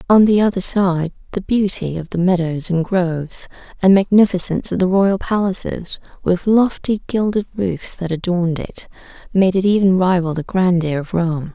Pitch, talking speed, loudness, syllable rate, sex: 185 Hz, 165 wpm, -17 LUFS, 4.9 syllables/s, female